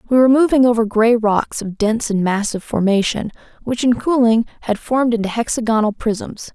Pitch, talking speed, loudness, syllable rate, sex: 230 Hz, 175 wpm, -17 LUFS, 5.7 syllables/s, female